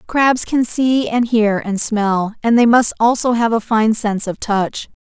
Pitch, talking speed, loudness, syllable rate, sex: 225 Hz, 205 wpm, -16 LUFS, 4.1 syllables/s, female